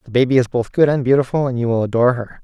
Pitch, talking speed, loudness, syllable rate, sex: 125 Hz, 295 wpm, -17 LUFS, 7.4 syllables/s, male